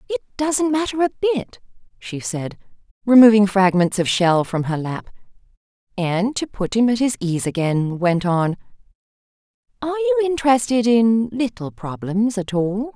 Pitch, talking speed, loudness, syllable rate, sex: 220 Hz, 150 wpm, -19 LUFS, 4.6 syllables/s, female